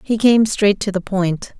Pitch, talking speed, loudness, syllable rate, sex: 200 Hz, 225 wpm, -17 LUFS, 4.1 syllables/s, female